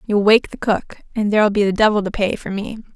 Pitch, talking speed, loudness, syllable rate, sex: 205 Hz, 265 wpm, -18 LUFS, 5.9 syllables/s, female